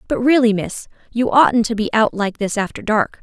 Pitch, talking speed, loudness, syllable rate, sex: 225 Hz, 225 wpm, -17 LUFS, 5.0 syllables/s, female